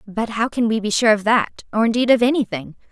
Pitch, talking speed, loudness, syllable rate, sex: 220 Hz, 245 wpm, -18 LUFS, 5.8 syllables/s, female